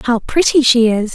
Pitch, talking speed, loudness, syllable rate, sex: 245 Hz, 210 wpm, -13 LUFS, 5.3 syllables/s, female